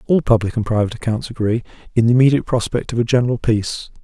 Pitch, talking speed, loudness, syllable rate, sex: 115 Hz, 210 wpm, -18 LUFS, 7.6 syllables/s, male